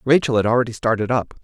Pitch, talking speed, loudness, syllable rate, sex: 120 Hz, 210 wpm, -19 LUFS, 6.8 syllables/s, male